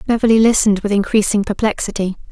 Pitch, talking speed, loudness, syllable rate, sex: 210 Hz, 130 wpm, -15 LUFS, 6.8 syllables/s, female